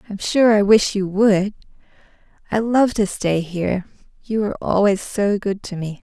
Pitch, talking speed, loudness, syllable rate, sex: 200 Hz, 175 wpm, -19 LUFS, 4.7 syllables/s, female